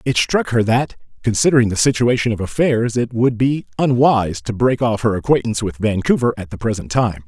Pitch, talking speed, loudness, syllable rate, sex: 115 Hz, 200 wpm, -17 LUFS, 5.7 syllables/s, male